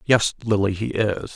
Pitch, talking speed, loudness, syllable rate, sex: 105 Hz, 180 wpm, -22 LUFS, 3.5 syllables/s, male